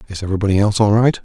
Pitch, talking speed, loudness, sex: 100 Hz, 240 wpm, -16 LUFS, male